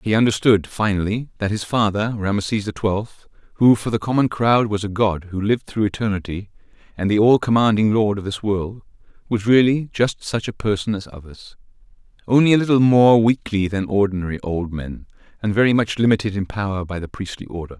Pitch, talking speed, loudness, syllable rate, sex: 105 Hz, 190 wpm, -19 LUFS, 5.5 syllables/s, male